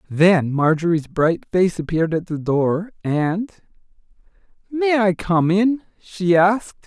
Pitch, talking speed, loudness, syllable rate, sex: 180 Hz, 130 wpm, -19 LUFS, 4.0 syllables/s, male